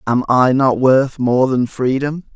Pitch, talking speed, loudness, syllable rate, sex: 130 Hz, 180 wpm, -15 LUFS, 3.8 syllables/s, male